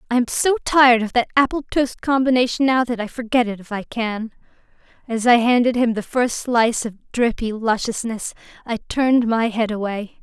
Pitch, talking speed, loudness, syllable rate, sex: 235 Hz, 190 wpm, -19 LUFS, 5.2 syllables/s, female